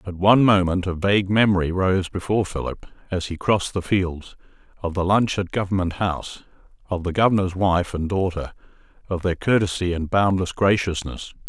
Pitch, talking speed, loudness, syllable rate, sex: 95 Hz, 165 wpm, -22 LUFS, 5.4 syllables/s, male